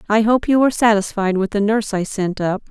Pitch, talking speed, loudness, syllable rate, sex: 210 Hz, 245 wpm, -17 LUFS, 6.1 syllables/s, female